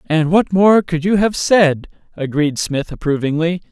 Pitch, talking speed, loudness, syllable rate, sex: 170 Hz, 160 wpm, -15 LUFS, 4.3 syllables/s, male